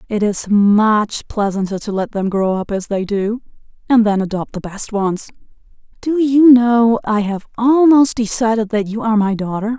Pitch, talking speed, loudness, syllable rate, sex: 215 Hz, 185 wpm, -16 LUFS, 4.6 syllables/s, female